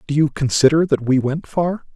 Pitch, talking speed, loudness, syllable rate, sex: 150 Hz, 215 wpm, -18 LUFS, 5.1 syllables/s, male